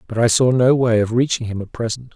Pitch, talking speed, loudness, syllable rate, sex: 120 Hz, 280 wpm, -18 LUFS, 6.0 syllables/s, male